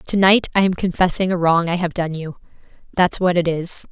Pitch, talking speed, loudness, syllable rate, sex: 175 Hz, 230 wpm, -18 LUFS, 5.4 syllables/s, female